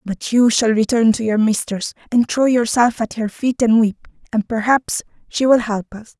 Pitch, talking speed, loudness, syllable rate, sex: 225 Hz, 205 wpm, -17 LUFS, 4.7 syllables/s, female